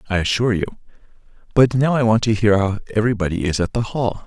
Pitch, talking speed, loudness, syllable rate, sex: 110 Hz, 210 wpm, -19 LUFS, 7.0 syllables/s, male